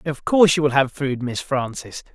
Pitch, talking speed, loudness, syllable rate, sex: 140 Hz, 225 wpm, -20 LUFS, 5.2 syllables/s, male